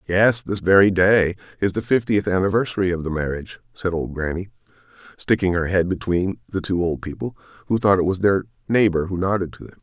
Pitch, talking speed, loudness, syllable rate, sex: 95 Hz, 195 wpm, -21 LUFS, 5.8 syllables/s, male